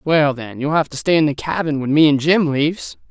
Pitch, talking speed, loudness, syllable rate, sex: 150 Hz, 270 wpm, -17 LUFS, 5.5 syllables/s, male